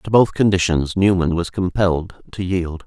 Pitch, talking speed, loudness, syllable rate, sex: 90 Hz, 170 wpm, -18 LUFS, 4.8 syllables/s, male